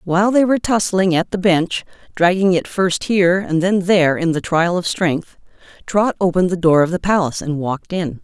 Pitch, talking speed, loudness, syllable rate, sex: 180 Hz, 210 wpm, -17 LUFS, 5.5 syllables/s, female